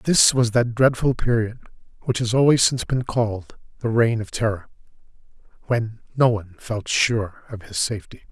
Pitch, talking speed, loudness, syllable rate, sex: 115 Hz, 165 wpm, -21 LUFS, 5.0 syllables/s, male